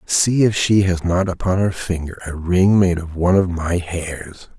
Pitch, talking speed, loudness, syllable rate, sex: 90 Hz, 210 wpm, -18 LUFS, 4.4 syllables/s, male